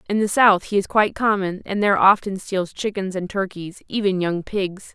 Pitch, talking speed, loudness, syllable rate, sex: 195 Hz, 205 wpm, -20 LUFS, 5.1 syllables/s, female